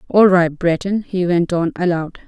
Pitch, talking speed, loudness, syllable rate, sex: 180 Hz, 185 wpm, -17 LUFS, 4.5 syllables/s, female